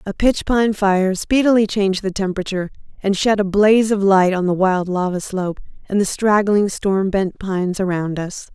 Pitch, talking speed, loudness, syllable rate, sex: 195 Hz, 190 wpm, -18 LUFS, 5.1 syllables/s, female